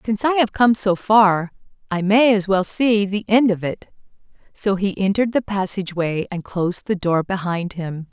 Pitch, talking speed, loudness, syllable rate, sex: 195 Hz, 190 wpm, -19 LUFS, 4.9 syllables/s, female